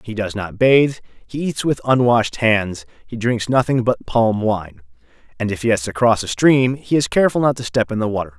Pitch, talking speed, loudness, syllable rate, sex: 115 Hz, 230 wpm, -18 LUFS, 5.2 syllables/s, male